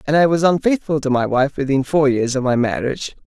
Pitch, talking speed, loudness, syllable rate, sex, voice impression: 140 Hz, 240 wpm, -18 LUFS, 5.9 syllables/s, male, very masculine, very feminine, slightly young, slightly thick, slightly relaxed, slightly powerful, very bright, very hard, clear, fluent, slightly cool, intellectual, refreshing, sincere, calm, mature, friendly, reassuring, very unique, slightly elegant, wild, slightly sweet, lively, kind